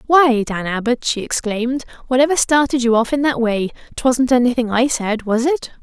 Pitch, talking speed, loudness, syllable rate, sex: 245 Hz, 185 wpm, -17 LUFS, 5.2 syllables/s, female